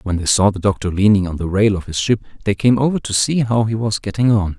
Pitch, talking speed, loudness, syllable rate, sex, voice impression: 105 Hz, 290 wpm, -17 LUFS, 6.1 syllables/s, male, very masculine, adult-like, slightly middle-aged, thick, slightly relaxed, powerful, slightly bright, very soft, muffled, fluent, slightly raspy, very cool, intellectual, slightly refreshing, sincere, very calm, mature, very friendly, very reassuring, very unique, very elegant, wild, very sweet, lively, very kind, slightly modest